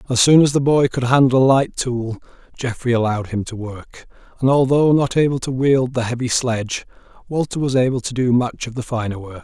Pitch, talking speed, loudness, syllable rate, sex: 125 Hz, 215 wpm, -18 LUFS, 5.6 syllables/s, male